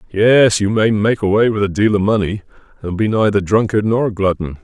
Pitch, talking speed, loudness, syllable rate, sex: 105 Hz, 205 wpm, -15 LUFS, 5.2 syllables/s, male